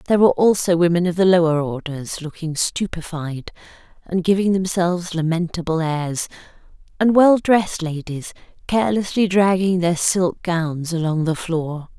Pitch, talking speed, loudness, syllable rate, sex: 175 Hz, 135 wpm, -19 LUFS, 4.8 syllables/s, female